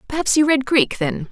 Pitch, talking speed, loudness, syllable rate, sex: 260 Hz, 230 wpm, -17 LUFS, 5.2 syllables/s, female